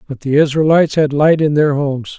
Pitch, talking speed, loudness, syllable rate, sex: 145 Hz, 220 wpm, -14 LUFS, 5.9 syllables/s, male